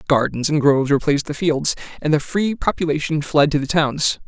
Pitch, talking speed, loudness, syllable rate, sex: 150 Hz, 195 wpm, -19 LUFS, 5.5 syllables/s, male